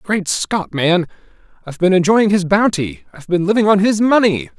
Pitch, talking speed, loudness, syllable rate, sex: 185 Hz, 185 wpm, -15 LUFS, 5.2 syllables/s, male